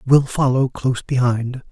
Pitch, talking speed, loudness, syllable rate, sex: 130 Hz, 140 wpm, -19 LUFS, 4.6 syllables/s, male